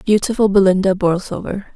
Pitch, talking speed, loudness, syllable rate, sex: 195 Hz, 105 wpm, -16 LUFS, 5.3 syllables/s, female